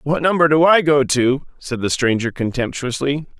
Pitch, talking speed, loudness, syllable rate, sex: 140 Hz, 175 wpm, -17 LUFS, 4.9 syllables/s, male